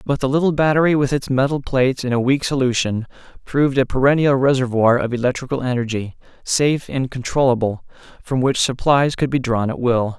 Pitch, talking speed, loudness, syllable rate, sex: 130 Hz, 175 wpm, -18 LUFS, 5.8 syllables/s, male